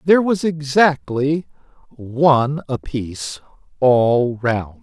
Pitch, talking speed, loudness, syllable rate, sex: 140 Hz, 100 wpm, -18 LUFS, 3.4 syllables/s, male